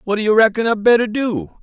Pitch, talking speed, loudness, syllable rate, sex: 210 Hz, 220 wpm, -16 LUFS, 5.3 syllables/s, male